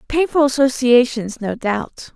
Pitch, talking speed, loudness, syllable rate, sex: 255 Hz, 110 wpm, -17 LUFS, 4.0 syllables/s, female